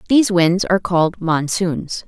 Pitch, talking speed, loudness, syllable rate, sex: 180 Hz, 145 wpm, -17 LUFS, 4.8 syllables/s, female